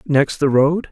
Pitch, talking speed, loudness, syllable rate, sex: 145 Hz, 195 wpm, -16 LUFS, 3.9 syllables/s, male